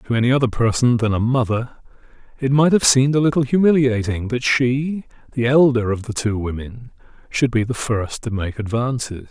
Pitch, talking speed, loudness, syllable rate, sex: 120 Hz, 185 wpm, -18 LUFS, 5.3 syllables/s, male